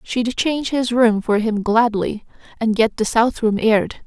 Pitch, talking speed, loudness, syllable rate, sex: 225 Hz, 190 wpm, -18 LUFS, 4.4 syllables/s, female